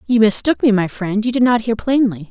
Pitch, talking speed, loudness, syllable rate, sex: 225 Hz, 260 wpm, -16 LUFS, 5.5 syllables/s, female